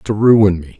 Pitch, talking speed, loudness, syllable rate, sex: 100 Hz, 225 wpm, -12 LUFS, 4.0 syllables/s, male